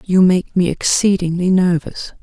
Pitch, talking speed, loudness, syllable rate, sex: 180 Hz, 135 wpm, -15 LUFS, 4.4 syllables/s, female